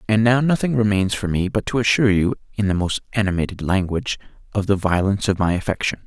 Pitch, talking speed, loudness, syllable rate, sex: 100 Hz, 210 wpm, -20 LUFS, 6.4 syllables/s, male